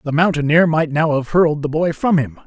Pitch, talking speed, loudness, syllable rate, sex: 155 Hz, 245 wpm, -16 LUFS, 5.6 syllables/s, male